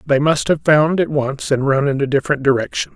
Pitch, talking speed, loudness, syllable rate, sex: 140 Hz, 245 wpm, -17 LUFS, 5.7 syllables/s, male